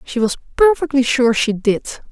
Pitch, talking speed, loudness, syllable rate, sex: 255 Hz, 170 wpm, -16 LUFS, 5.0 syllables/s, female